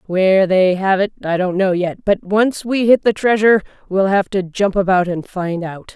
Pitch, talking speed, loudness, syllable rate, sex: 195 Hz, 220 wpm, -16 LUFS, 4.9 syllables/s, female